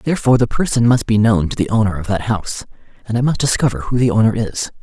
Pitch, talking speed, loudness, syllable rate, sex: 110 Hz, 250 wpm, -16 LUFS, 6.7 syllables/s, male